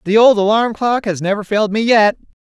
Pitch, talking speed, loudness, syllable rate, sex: 215 Hz, 220 wpm, -14 LUFS, 5.8 syllables/s, female